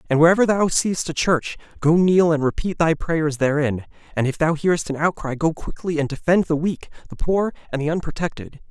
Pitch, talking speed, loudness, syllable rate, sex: 160 Hz, 205 wpm, -21 LUFS, 5.6 syllables/s, male